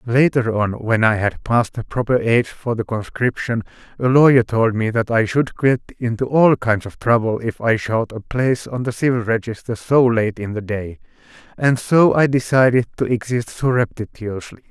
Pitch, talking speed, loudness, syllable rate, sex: 120 Hz, 190 wpm, -18 LUFS, 4.9 syllables/s, male